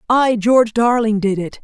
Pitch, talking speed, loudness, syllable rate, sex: 225 Hz, 185 wpm, -15 LUFS, 4.8 syllables/s, female